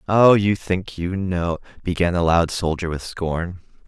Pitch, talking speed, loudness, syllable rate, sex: 90 Hz, 170 wpm, -21 LUFS, 4.0 syllables/s, male